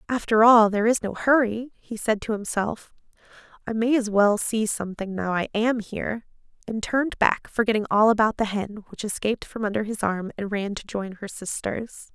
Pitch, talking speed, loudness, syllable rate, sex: 215 Hz, 205 wpm, -24 LUFS, 5.4 syllables/s, female